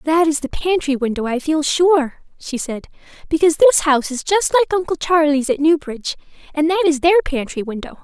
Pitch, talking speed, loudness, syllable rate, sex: 310 Hz, 195 wpm, -17 LUFS, 5.5 syllables/s, female